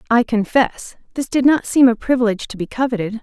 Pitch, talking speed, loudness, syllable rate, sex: 235 Hz, 205 wpm, -17 LUFS, 6.0 syllables/s, female